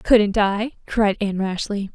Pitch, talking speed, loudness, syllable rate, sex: 205 Hz, 155 wpm, -21 LUFS, 4.1 syllables/s, female